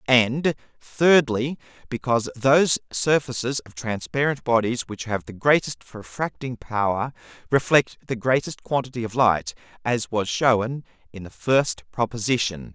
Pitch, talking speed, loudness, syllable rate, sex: 120 Hz, 125 wpm, -23 LUFS, 4.4 syllables/s, male